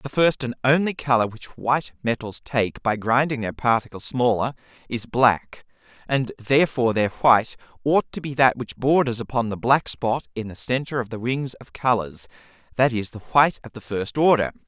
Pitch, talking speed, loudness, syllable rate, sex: 120 Hz, 190 wpm, -22 LUFS, 5.1 syllables/s, male